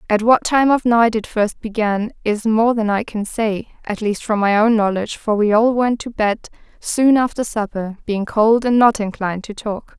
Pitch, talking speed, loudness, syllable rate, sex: 220 Hz, 215 wpm, -17 LUFS, 4.7 syllables/s, female